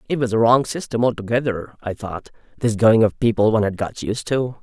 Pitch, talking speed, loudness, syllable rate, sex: 115 Hz, 220 wpm, -20 LUFS, 5.7 syllables/s, male